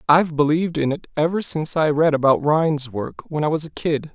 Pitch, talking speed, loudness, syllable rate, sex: 150 Hz, 230 wpm, -20 LUFS, 5.9 syllables/s, male